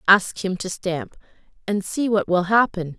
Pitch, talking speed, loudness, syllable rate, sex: 195 Hz, 180 wpm, -21 LUFS, 4.3 syllables/s, female